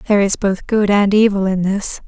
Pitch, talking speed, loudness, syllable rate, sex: 200 Hz, 230 wpm, -15 LUFS, 5.4 syllables/s, female